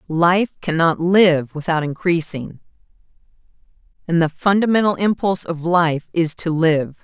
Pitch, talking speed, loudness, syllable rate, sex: 170 Hz, 120 wpm, -18 LUFS, 4.3 syllables/s, female